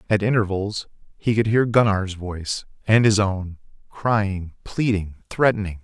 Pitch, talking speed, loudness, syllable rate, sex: 100 Hz, 115 wpm, -21 LUFS, 4.4 syllables/s, male